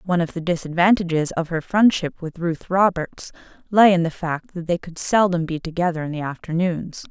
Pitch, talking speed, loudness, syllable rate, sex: 170 Hz, 195 wpm, -21 LUFS, 5.3 syllables/s, female